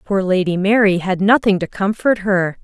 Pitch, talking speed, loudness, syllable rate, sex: 195 Hz, 180 wpm, -16 LUFS, 4.8 syllables/s, female